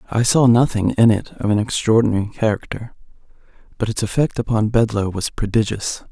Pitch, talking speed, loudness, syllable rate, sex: 110 Hz, 155 wpm, -18 LUFS, 5.7 syllables/s, male